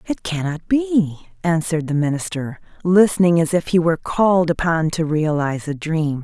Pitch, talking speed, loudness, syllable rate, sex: 165 Hz, 165 wpm, -19 LUFS, 5.3 syllables/s, female